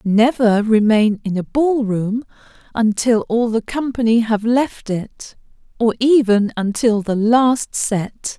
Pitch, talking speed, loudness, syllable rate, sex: 225 Hz, 135 wpm, -17 LUFS, 3.6 syllables/s, female